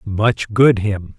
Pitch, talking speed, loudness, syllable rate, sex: 105 Hz, 150 wpm, -16 LUFS, 2.8 syllables/s, male